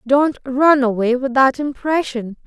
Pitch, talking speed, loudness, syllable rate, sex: 265 Hz, 145 wpm, -17 LUFS, 4.1 syllables/s, female